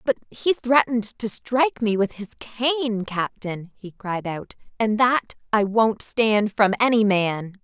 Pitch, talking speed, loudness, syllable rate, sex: 220 Hz, 165 wpm, -22 LUFS, 3.9 syllables/s, female